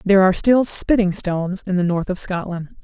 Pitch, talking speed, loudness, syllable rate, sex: 190 Hz, 210 wpm, -18 LUFS, 5.8 syllables/s, female